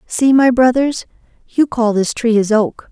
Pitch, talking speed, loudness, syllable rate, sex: 240 Hz, 185 wpm, -14 LUFS, 4.2 syllables/s, female